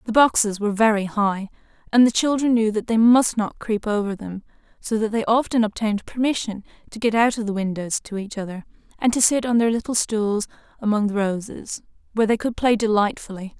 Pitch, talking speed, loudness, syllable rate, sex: 220 Hz, 200 wpm, -21 LUFS, 5.6 syllables/s, female